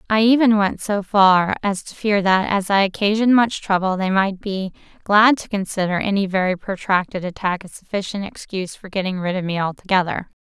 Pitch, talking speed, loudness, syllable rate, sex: 195 Hz, 190 wpm, -19 LUFS, 5.4 syllables/s, female